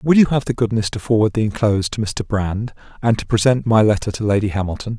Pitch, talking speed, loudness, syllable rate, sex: 110 Hz, 240 wpm, -18 LUFS, 6.2 syllables/s, male